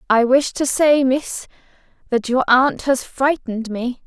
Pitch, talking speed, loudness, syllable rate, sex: 260 Hz, 160 wpm, -18 LUFS, 4.0 syllables/s, female